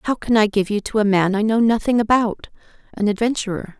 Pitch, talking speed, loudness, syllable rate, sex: 215 Hz, 205 wpm, -19 LUFS, 6.0 syllables/s, female